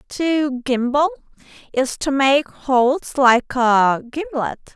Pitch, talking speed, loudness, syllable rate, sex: 270 Hz, 115 wpm, -18 LUFS, 3.3 syllables/s, female